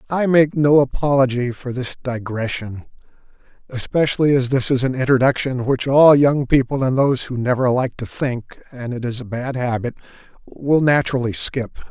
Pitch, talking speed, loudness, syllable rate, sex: 130 Hz, 165 wpm, -18 LUFS, 4.7 syllables/s, male